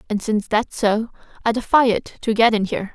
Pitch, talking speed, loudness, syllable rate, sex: 220 Hz, 225 wpm, -19 LUFS, 6.0 syllables/s, female